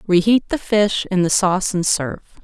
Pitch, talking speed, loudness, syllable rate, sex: 190 Hz, 195 wpm, -18 LUFS, 5.4 syllables/s, female